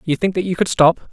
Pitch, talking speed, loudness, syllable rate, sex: 175 Hz, 320 wpm, -17 LUFS, 5.9 syllables/s, male